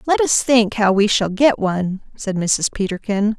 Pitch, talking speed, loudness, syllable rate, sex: 210 Hz, 195 wpm, -17 LUFS, 4.5 syllables/s, female